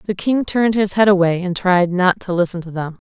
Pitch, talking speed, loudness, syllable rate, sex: 190 Hz, 255 wpm, -17 LUFS, 5.6 syllables/s, female